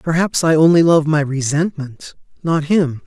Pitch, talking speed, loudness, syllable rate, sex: 155 Hz, 155 wpm, -15 LUFS, 4.4 syllables/s, male